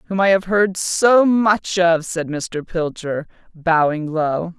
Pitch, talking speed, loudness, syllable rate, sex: 175 Hz, 155 wpm, -18 LUFS, 3.4 syllables/s, female